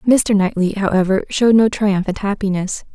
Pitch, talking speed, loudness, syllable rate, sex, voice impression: 200 Hz, 145 wpm, -16 LUFS, 5.3 syllables/s, female, feminine, adult-like, tensed, bright, slightly soft, slightly muffled, intellectual, calm, reassuring, elegant, slightly modest